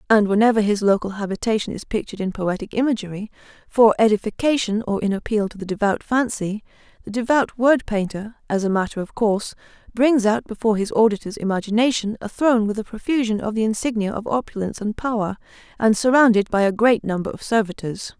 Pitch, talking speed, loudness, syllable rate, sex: 215 Hz, 180 wpm, -20 LUFS, 6.1 syllables/s, female